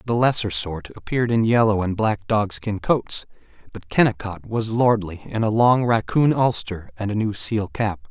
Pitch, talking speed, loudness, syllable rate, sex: 110 Hz, 180 wpm, -21 LUFS, 4.7 syllables/s, male